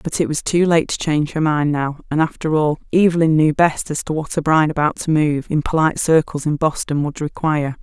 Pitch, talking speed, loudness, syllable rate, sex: 155 Hz, 240 wpm, -18 LUFS, 5.8 syllables/s, female